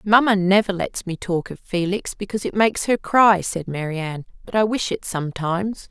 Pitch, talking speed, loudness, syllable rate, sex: 190 Hz, 195 wpm, -21 LUFS, 5.3 syllables/s, female